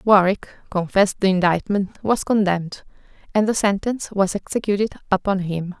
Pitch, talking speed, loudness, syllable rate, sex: 195 Hz, 135 wpm, -21 LUFS, 5.3 syllables/s, female